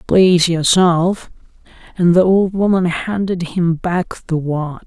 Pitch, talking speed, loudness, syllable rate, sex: 175 Hz, 125 wpm, -15 LUFS, 3.7 syllables/s, male